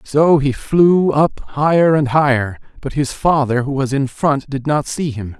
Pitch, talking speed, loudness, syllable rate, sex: 140 Hz, 200 wpm, -16 LUFS, 4.2 syllables/s, male